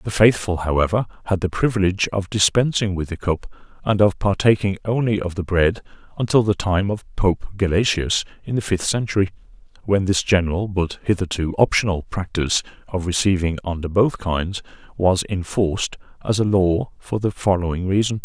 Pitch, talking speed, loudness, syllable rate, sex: 95 Hz, 160 wpm, -20 LUFS, 5.3 syllables/s, male